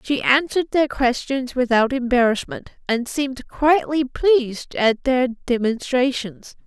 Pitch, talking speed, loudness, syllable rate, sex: 255 Hz, 115 wpm, -20 LUFS, 4.1 syllables/s, female